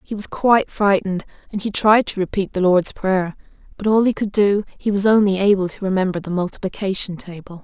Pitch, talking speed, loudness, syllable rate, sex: 195 Hz, 205 wpm, -18 LUFS, 5.7 syllables/s, female